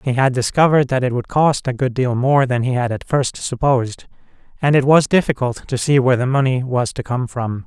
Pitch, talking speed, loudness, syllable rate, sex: 130 Hz, 235 wpm, -17 LUFS, 5.6 syllables/s, male